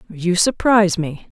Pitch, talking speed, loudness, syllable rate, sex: 185 Hz, 130 wpm, -17 LUFS, 4.5 syllables/s, female